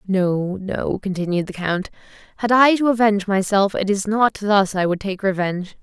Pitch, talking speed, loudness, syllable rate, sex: 200 Hz, 185 wpm, -19 LUFS, 4.9 syllables/s, female